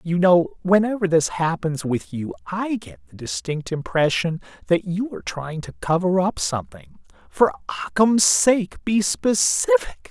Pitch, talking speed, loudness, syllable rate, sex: 160 Hz, 140 wpm, -21 LUFS, 4.3 syllables/s, male